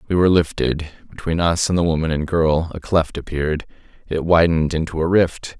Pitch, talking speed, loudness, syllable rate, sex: 80 Hz, 195 wpm, -19 LUFS, 5.6 syllables/s, male